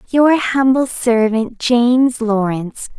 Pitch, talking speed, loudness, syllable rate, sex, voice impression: 240 Hz, 100 wpm, -15 LUFS, 3.6 syllables/s, female, very feminine, slightly young, adult-like, very thin, tensed, slightly weak, very bright, soft, clear, fluent, very cute, slightly intellectual, refreshing, sincere, calm, friendly, reassuring, very unique, very elegant, wild, very sweet, very lively, strict, intense, slightly sharp